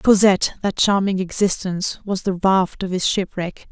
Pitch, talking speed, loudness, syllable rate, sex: 190 Hz, 160 wpm, -19 LUFS, 4.8 syllables/s, female